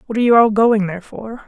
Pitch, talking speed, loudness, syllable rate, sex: 215 Hz, 285 wpm, -14 LUFS, 6.9 syllables/s, female